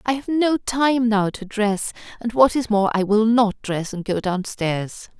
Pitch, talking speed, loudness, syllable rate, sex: 220 Hz, 220 wpm, -20 LUFS, 4.1 syllables/s, female